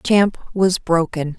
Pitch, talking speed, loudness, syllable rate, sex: 180 Hz, 130 wpm, -18 LUFS, 3.5 syllables/s, female